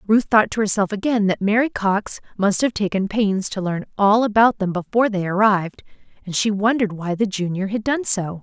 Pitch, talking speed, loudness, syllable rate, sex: 205 Hz, 205 wpm, -19 LUFS, 5.4 syllables/s, female